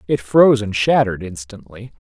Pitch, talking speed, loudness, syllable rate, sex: 110 Hz, 145 wpm, -16 LUFS, 5.6 syllables/s, male